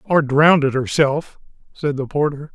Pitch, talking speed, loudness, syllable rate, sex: 145 Hz, 140 wpm, -18 LUFS, 4.3 syllables/s, male